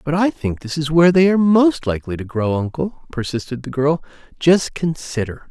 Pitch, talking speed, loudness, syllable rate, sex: 150 Hz, 195 wpm, -18 LUFS, 5.5 syllables/s, male